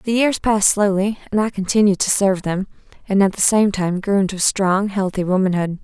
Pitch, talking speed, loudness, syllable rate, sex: 195 Hz, 205 wpm, -18 LUFS, 5.5 syllables/s, female